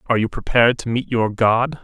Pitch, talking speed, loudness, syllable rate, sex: 115 Hz, 230 wpm, -18 LUFS, 6.0 syllables/s, male